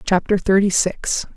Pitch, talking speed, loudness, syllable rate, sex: 190 Hz, 130 wpm, -18 LUFS, 4.2 syllables/s, female